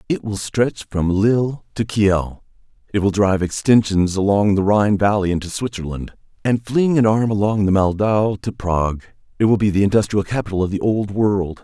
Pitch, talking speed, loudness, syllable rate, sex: 105 Hz, 185 wpm, -18 LUFS, 5.2 syllables/s, male